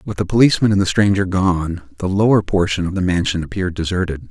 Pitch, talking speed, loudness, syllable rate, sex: 95 Hz, 210 wpm, -17 LUFS, 6.5 syllables/s, male